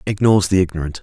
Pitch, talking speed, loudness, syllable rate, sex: 90 Hz, 175 wpm, -16 LUFS, 7.7 syllables/s, male